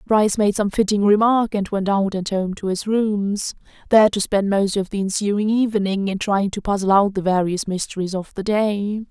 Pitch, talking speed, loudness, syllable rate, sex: 200 Hz, 205 wpm, -20 LUFS, 5.0 syllables/s, female